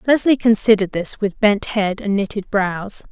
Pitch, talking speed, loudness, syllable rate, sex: 205 Hz, 175 wpm, -18 LUFS, 4.7 syllables/s, female